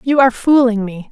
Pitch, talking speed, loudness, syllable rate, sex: 240 Hz, 215 wpm, -14 LUFS, 5.9 syllables/s, female